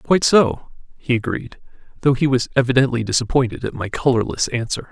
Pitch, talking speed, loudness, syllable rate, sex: 125 Hz, 160 wpm, -19 LUFS, 5.8 syllables/s, male